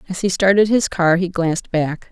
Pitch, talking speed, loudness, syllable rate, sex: 180 Hz, 225 wpm, -17 LUFS, 5.3 syllables/s, female